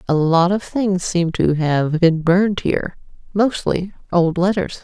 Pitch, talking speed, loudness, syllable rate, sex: 175 Hz, 160 wpm, -18 LUFS, 4.1 syllables/s, female